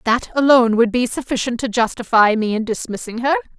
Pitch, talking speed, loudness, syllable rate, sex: 235 Hz, 185 wpm, -17 LUFS, 5.9 syllables/s, female